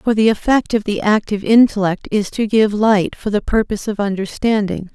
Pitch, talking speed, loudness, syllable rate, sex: 210 Hz, 195 wpm, -16 LUFS, 5.4 syllables/s, female